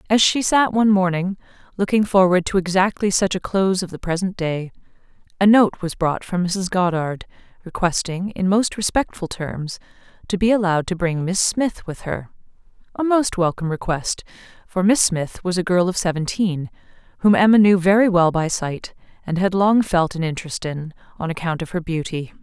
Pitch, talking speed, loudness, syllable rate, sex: 185 Hz, 180 wpm, -19 LUFS, 5.2 syllables/s, female